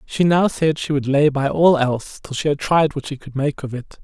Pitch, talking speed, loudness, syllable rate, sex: 145 Hz, 285 wpm, -19 LUFS, 5.1 syllables/s, male